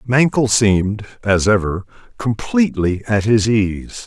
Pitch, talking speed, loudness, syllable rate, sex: 110 Hz, 120 wpm, -17 LUFS, 4.3 syllables/s, male